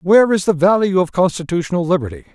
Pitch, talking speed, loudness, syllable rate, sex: 180 Hz, 180 wpm, -16 LUFS, 6.9 syllables/s, male